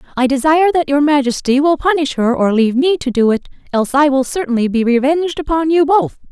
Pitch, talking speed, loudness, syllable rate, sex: 280 Hz, 210 wpm, -14 LUFS, 6.2 syllables/s, female